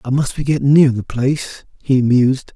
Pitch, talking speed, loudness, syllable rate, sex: 135 Hz, 210 wpm, -15 LUFS, 5.2 syllables/s, male